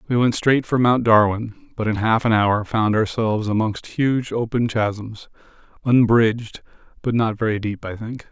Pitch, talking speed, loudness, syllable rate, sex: 110 Hz, 175 wpm, -20 LUFS, 4.6 syllables/s, male